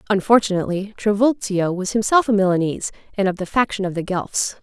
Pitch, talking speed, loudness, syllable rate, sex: 200 Hz, 170 wpm, -20 LUFS, 6.0 syllables/s, female